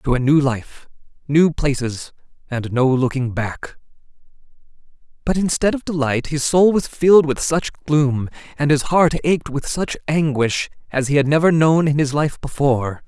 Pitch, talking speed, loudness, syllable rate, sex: 145 Hz, 170 wpm, -18 LUFS, 4.6 syllables/s, male